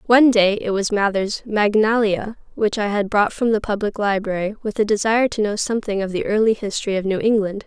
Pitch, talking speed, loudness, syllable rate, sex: 210 Hz, 210 wpm, -19 LUFS, 5.8 syllables/s, female